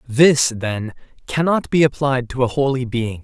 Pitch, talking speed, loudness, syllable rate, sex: 130 Hz, 165 wpm, -18 LUFS, 4.3 syllables/s, male